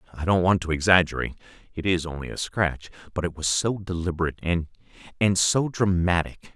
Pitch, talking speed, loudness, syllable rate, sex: 90 Hz, 155 wpm, -24 LUFS, 6.1 syllables/s, male